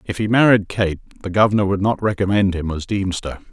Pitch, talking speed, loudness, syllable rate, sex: 100 Hz, 205 wpm, -18 LUFS, 5.8 syllables/s, male